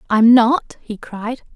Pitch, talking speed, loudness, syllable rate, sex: 235 Hz, 155 wpm, -15 LUFS, 3.3 syllables/s, female